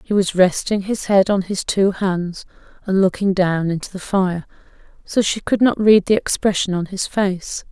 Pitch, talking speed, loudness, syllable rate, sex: 190 Hz, 195 wpm, -18 LUFS, 4.5 syllables/s, female